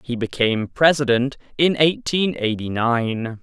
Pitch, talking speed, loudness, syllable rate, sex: 130 Hz, 125 wpm, -20 LUFS, 4.2 syllables/s, male